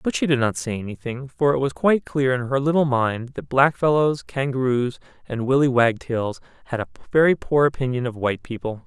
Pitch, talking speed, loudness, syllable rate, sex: 130 Hz, 195 wpm, -22 LUFS, 5.5 syllables/s, male